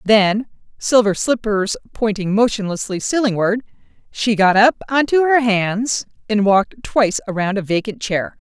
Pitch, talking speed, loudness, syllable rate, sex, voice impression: 215 Hz, 135 wpm, -17 LUFS, 4.6 syllables/s, female, feminine, adult-like, tensed, powerful, slightly bright, clear, fluent, slightly raspy, slightly friendly, slightly unique, lively, intense